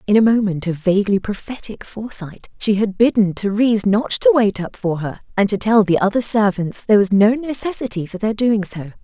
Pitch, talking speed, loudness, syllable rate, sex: 210 Hz, 205 wpm, -17 LUFS, 5.5 syllables/s, female